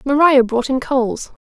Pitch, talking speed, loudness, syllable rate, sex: 265 Hz, 170 wpm, -16 LUFS, 4.8 syllables/s, female